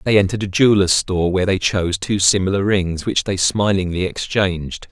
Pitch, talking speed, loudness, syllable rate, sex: 95 Hz, 185 wpm, -17 LUFS, 5.9 syllables/s, male